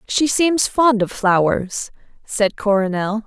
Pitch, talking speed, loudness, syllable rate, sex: 220 Hz, 130 wpm, -18 LUFS, 3.6 syllables/s, female